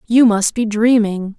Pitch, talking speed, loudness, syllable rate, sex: 220 Hz, 175 wpm, -15 LUFS, 4.0 syllables/s, female